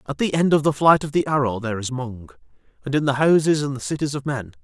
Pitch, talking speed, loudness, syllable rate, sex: 135 Hz, 270 wpm, -20 LUFS, 6.5 syllables/s, male